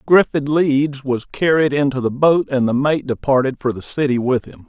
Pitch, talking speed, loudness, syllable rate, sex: 135 Hz, 205 wpm, -17 LUFS, 4.8 syllables/s, male